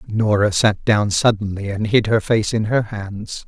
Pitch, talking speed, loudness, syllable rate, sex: 105 Hz, 190 wpm, -18 LUFS, 4.2 syllables/s, male